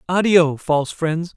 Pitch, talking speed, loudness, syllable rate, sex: 165 Hz, 130 wpm, -18 LUFS, 4.2 syllables/s, male